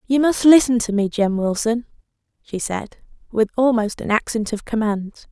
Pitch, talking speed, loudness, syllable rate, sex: 225 Hz, 170 wpm, -19 LUFS, 4.7 syllables/s, female